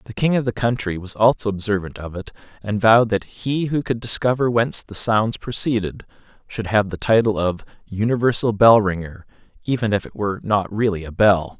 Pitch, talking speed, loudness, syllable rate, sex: 110 Hz, 190 wpm, -20 LUFS, 5.5 syllables/s, male